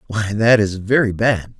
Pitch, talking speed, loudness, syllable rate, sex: 105 Hz, 190 wpm, -17 LUFS, 4.3 syllables/s, male